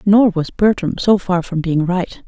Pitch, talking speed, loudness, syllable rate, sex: 185 Hz, 210 wpm, -16 LUFS, 4.2 syllables/s, female